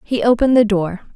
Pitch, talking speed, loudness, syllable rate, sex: 220 Hz, 210 wpm, -16 LUFS, 6.1 syllables/s, female